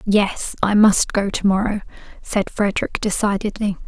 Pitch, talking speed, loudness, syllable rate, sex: 205 Hz, 140 wpm, -19 LUFS, 4.7 syllables/s, female